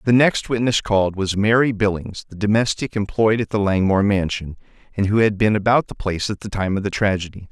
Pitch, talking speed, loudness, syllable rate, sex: 105 Hz, 215 wpm, -19 LUFS, 5.9 syllables/s, male